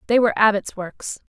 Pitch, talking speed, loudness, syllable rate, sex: 215 Hz, 185 wpm, -19 LUFS, 5.8 syllables/s, female